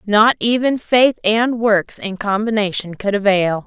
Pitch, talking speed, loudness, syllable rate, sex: 210 Hz, 150 wpm, -16 LUFS, 4.1 syllables/s, female